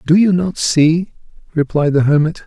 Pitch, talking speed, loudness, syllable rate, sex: 160 Hz, 170 wpm, -15 LUFS, 4.7 syllables/s, male